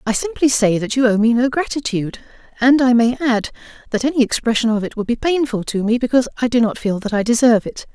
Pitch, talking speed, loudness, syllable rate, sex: 240 Hz, 240 wpm, -17 LUFS, 6.5 syllables/s, female